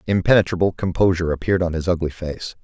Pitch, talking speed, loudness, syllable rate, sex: 90 Hz, 160 wpm, -20 LUFS, 6.9 syllables/s, male